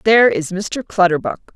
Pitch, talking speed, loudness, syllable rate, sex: 190 Hz, 155 wpm, -17 LUFS, 4.9 syllables/s, female